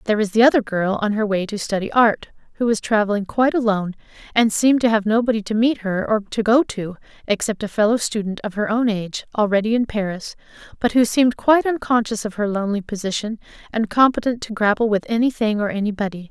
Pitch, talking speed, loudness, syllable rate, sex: 215 Hz, 205 wpm, -19 LUFS, 6.3 syllables/s, female